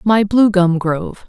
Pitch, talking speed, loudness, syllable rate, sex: 195 Hz, 190 wpm, -15 LUFS, 4.3 syllables/s, female